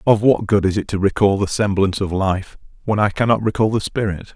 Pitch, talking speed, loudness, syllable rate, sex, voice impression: 100 Hz, 235 wpm, -18 LUFS, 5.8 syllables/s, male, masculine, adult-like, slightly thick, cool, slightly intellectual, calm